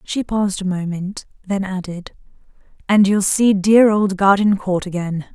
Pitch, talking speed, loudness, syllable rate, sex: 195 Hz, 145 wpm, -17 LUFS, 4.4 syllables/s, female